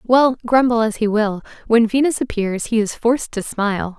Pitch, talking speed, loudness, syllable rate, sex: 225 Hz, 195 wpm, -18 LUFS, 5.1 syllables/s, female